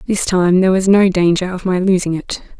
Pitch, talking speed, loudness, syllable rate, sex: 185 Hz, 230 wpm, -14 LUFS, 5.7 syllables/s, female